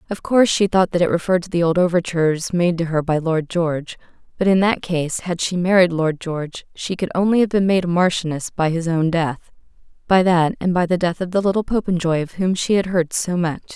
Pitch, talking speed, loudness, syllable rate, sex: 175 Hz, 235 wpm, -19 LUFS, 5.7 syllables/s, female